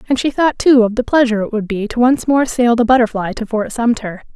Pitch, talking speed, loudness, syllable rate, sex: 235 Hz, 260 wpm, -15 LUFS, 5.9 syllables/s, female